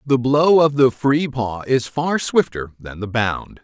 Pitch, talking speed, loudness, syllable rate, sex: 125 Hz, 200 wpm, -18 LUFS, 3.9 syllables/s, male